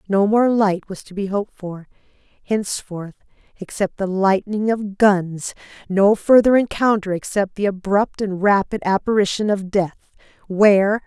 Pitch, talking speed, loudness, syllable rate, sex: 200 Hz, 140 wpm, -19 LUFS, 4.6 syllables/s, female